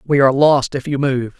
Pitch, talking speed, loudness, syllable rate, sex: 135 Hz, 260 wpm, -15 LUFS, 5.4 syllables/s, male